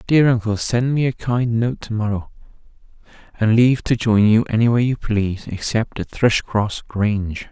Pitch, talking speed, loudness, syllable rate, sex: 115 Hz, 170 wpm, -19 LUFS, 4.9 syllables/s, male